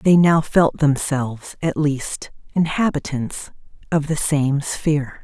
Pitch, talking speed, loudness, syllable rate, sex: 150 Hz, 125 wpm, -20 LUFS, 3.8 syllables/s, female